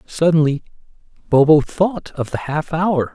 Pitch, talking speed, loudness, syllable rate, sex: 160 Hz, 135 wpm, -17 LUFS, 4.3 syllables/s, male